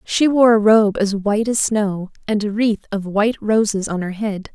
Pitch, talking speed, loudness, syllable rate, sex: 210 Hz, 225 wpm, -18 LUFS, 4.7 syllables/s, female